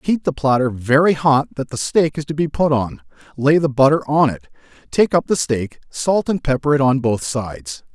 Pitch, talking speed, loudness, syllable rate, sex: 140 Hz, 220 wpm, -18 LUFS, 5.0 syllables/s, male